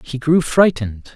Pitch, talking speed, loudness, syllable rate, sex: 135 Hz, 155 wpm, -15 LUFS, 4.8 syllables/s, male